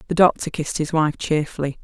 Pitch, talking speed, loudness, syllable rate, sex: 155 Hz, 195 wpm, -21 LUFS, 6.2 syllables/s, female